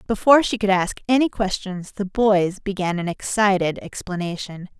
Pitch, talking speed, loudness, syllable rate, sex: 195 Hz, 150 wpm, -21 LUFS, 5.0 syllables/s, female